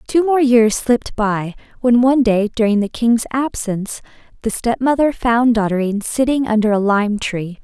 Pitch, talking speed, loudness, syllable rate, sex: 230 Hz, 165 wpm, -16 LUFS, 5.0 syllables/s, female